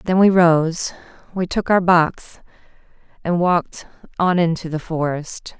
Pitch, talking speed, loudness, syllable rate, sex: 170 Hz, 140 wpm, -18 LUFS, 4.0 syllables/s, female